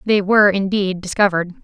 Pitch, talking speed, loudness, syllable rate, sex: 195 Hz, 145 wpm, -16 LUFS, 6.3 syllables/s, female